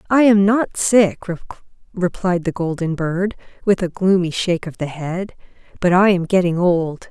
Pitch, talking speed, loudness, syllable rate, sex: 180 Hz, 170 wpm, -18 LUFS, 4.1 syllables/s, female